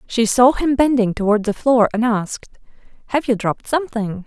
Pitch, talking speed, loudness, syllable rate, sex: 235 Hz, 185 wpm, -17 LUFS, 5.5 syllables/s, female